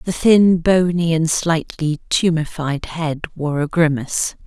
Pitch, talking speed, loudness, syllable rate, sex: 160 Hz, 135 wpm, -18 LUFS, 4.0 syllables/s, female